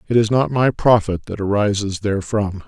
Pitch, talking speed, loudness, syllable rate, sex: 105 Hz, 180 wpm, -18 LUFS, 5.2 syllables/s, male